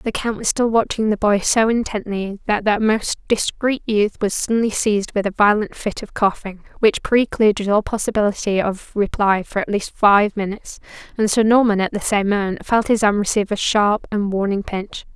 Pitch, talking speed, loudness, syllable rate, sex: 210 Hz, 200 wpm, -18 LUFS, 5.2 syllables/s, female